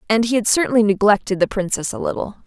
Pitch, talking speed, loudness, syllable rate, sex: 210 Hz, 220 wpm, -18 LUFS, 6.8 syllables/s, female